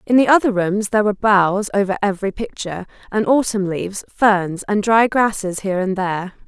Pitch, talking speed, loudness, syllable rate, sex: 205 Hz, 185 wpm, -18 LUFS, 5.6 syllables/s, female